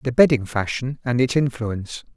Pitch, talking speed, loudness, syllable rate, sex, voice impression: 125 Hz, 165 wpm, -21 LUFS, 5.2 syllables/s, male, masculine, adult-like, tensed, powerful, bright, raspy, intellectual, calm, mature, friendly, reassuring, wild, strict